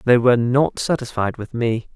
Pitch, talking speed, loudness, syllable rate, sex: 120 Hz, 185 wpm, -19 LUFS, 5.0 syllables/s, male